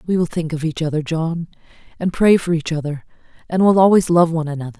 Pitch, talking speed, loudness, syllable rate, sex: 165 Hz, 225 wpm, -18 LUFS, 6.4 syllables/s, female